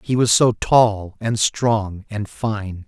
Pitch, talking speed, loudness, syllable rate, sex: 110 Hz, 165 wpm, -19 LUFS, 3.0 syllables/s, male